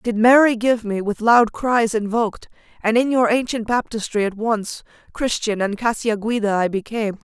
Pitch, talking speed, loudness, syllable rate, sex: 220 Hz, 165 wpm, -19 LUFS, 5.0 syllables/s, female